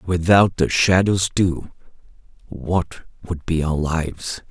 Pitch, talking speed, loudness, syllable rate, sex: 85 Hz, 120 wpm, -19 LUFS, 3.5 syllables/s, male